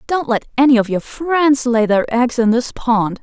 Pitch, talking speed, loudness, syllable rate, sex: 245 Hz, 225 wpm, -16 LUFS, 4.3 syllables/s, female